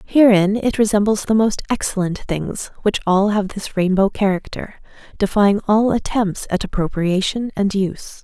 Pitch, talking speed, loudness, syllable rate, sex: 200 Hz, 145 wpm, -18 LUFS, 4.6 syllables/s, female